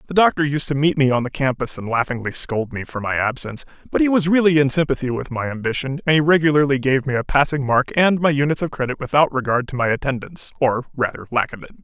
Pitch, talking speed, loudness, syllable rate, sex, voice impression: 140 Hz, 245 wpm, -19 LUFS, 6.5 syllables/s, male, very masculine, slightly old, very thick, tensed, slightly powerful, very bright, hard, very clear, very fluent, cool, intellectual, refreshing, sincere, slightly calm, very mature, very friendly, very reassuring, very unique, elegant, slightly wild, sweet, very lively, kind, slightly modest